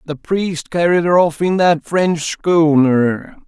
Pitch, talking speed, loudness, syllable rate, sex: 165 Hz, 155 wpm, -15 LUFS, 3.4 syllables/s, male